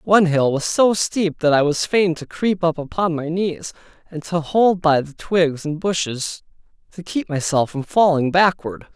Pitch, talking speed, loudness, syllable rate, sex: 165 Hz, 195 wpm, -19 LUFS, 4.4 syllables/s, male